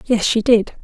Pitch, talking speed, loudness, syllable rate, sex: 220 Hz, 215 wpm, -16 LUFS, 4.3 syllables/s, female